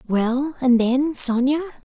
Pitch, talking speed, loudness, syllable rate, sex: 265 Hz, 125 wpm, -20 LUFS, 3.6 syllables/s, female